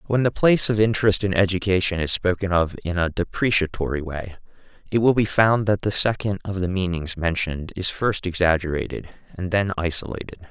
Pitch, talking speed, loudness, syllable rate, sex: 95 Hz, 175 wpm, -22 LUFS, 5.6 syllables/s, male